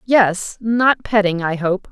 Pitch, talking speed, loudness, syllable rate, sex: 205 Hz, 155 wpm, -17 LUFS, 3.5 syllables/s, female